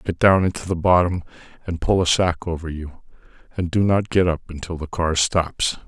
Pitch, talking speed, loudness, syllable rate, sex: 85 Hz, 205 wpm, -21 LUFS, 5.1 syllables/s, male